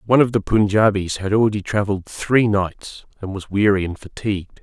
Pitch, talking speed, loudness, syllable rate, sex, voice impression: 100 Hz, 180 wpm, -19 LUFS, 5.6 syllables/s, male, masculine, adult-like, thick, tensed, slightly powerful, slightly hard, slightly raspy, cool, calm, mature, wild, lively, strict